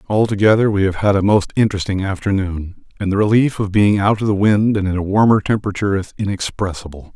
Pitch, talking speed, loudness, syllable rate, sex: 100 Hz, 200 wpm, -17 LUFS, 6.3 syllables/s, male